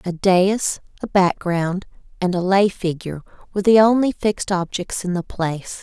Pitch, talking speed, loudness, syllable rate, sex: 185 Hz, 165 wpm, -19 LUFS, 4.9 syllables/s, female